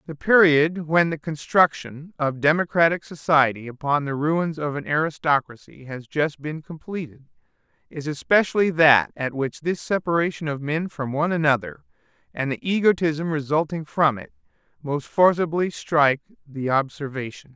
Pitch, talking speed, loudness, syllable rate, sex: 155 Hz, 140 wpm, -22 LUFS, 4.9 syllables/s, male